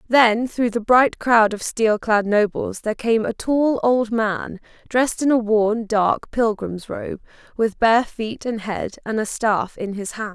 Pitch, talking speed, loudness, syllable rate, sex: 220 Hz, 190 wpm, -20 LUFS, 3.9 syllables/s, female